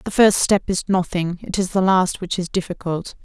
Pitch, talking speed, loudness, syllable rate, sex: 185 Hz, 220 wpm, -20 LUFS, 5.1 syllables/s, female